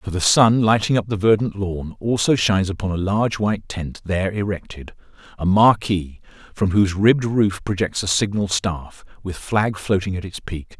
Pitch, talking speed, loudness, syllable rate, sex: 100 Hz, 170 wpm, -20 LUFS, 5.0 syllables/s, male